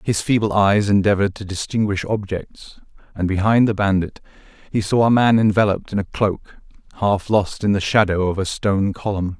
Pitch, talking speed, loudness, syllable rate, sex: 100 Hz, 180 wpm, -19 LUFS, 5.3 syllables/s, male